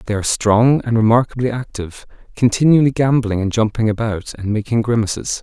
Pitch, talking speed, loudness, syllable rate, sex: 115 Hz, 155 wpm, -16 LUFS, 6.1 syllables/s, male